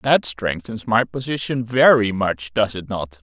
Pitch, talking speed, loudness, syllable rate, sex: 115 Hz, 165 wpm, -20 LUFS, 4.1 syllables/s, male